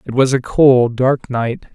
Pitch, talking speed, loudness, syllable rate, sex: 125 Hz, 205 wpm, -15 LUFS, 3.8 syllables/s, male